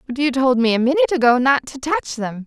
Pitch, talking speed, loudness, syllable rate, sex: 265 Hz, 270 wpm, -18 LUFS, 6.4 syllables/s, female